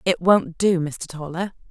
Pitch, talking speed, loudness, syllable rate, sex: 175 Hz, 175 wpm, -21 LUFS, 4.1 syllables/s, female